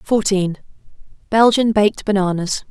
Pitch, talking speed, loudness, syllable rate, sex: 205 Hz, 65 wpm, -17 LUFS, 4.7 syllables/s, female